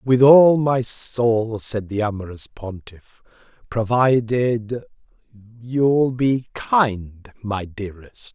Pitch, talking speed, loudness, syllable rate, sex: 115 Hz, 95 wpm, -19 LUFS, 3.4 syllables/s, male